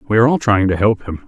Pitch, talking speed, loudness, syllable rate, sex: 105 Hz, 330 wpm, -15 LUFS, 7.4 syllables/s, male